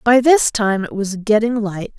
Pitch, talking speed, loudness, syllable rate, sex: 220 Hz, 210 wpm, -16 LUFS, 4.3 syllables/s, female